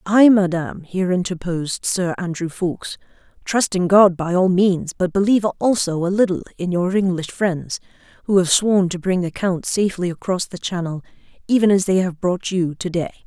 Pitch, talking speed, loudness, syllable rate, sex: 185 Hz, 185 wpm, -19 LUFS, 5.2 syllables/s, female